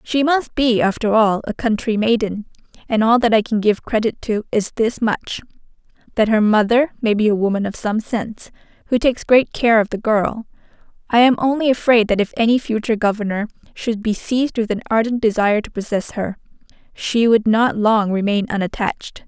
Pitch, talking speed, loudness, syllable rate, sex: 220 Hz, 190 wpm, -18 LUFS, 5.4 syllables/s, female